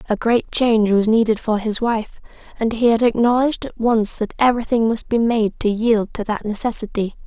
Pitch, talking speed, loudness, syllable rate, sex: 225 Hz, 200 wpm, -18 LUFS, 5.4 syllables/s, female